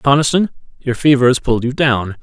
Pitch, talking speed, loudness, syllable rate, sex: 130 Hz, 190 wpm, -15 LUFS, 6.0 syllables/s, male